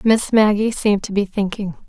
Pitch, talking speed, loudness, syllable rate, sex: 205 Hz, 190 wpm, -18 LUFS, 5.3 syllables/s, female